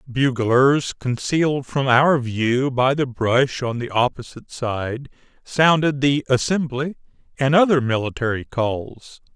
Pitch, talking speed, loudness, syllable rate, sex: 130 Hz, 120 wpm, -20 LUFS, 3.9 syllables/s, male